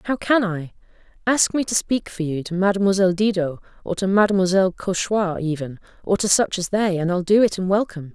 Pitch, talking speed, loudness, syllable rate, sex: 190 Hz, 205 wpm, -20 LUFS, 5.9 syllables/s, female